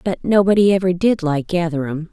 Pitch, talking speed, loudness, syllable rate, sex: 175 Hz, 170 wpm, -17 LUFS, 5.6 syllables/s, female